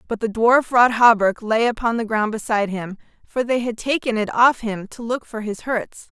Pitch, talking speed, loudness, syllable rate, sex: 225 Hz, 225 wpm, -19 LUFS, 4.9 syllables/s, female